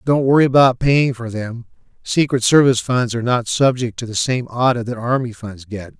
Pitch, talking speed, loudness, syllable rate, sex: 120 Hz, 200 wpm, -17 LUFS, 5.3 syllables/s, male